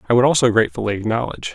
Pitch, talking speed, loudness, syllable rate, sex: 115 Hz, 195 wpm, -18 LUFS, 8.9 syllables/s, male